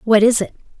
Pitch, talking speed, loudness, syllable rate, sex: 215 Hz, 225 wpm, -15 LUFS, 5.9 syllables/s, female